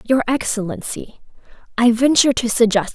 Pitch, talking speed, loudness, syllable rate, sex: 240 Hz, 120 wpm, -17 LUFS, 5.3 syllables/s, female